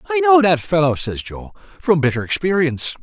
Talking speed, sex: 180 wpm, male